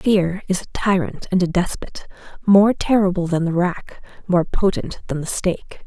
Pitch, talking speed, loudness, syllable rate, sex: 185 Hz, 175 wpm, -19 LUFS, 4.6 syllables/s, female